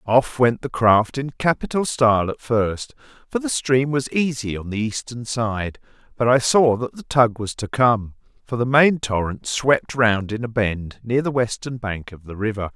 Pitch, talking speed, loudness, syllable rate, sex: 120 Hz, 200 wpm, -21 LUFS, 4.4 syllables/s, male